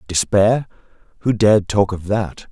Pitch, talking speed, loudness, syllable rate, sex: 105 Hz, 145 wpm, -17 LUFS, 4.5 syllables/s, male